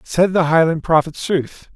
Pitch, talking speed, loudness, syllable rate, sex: 165 Hz, 170 wpm, -17 LUFS, 4.3 syllables/s, male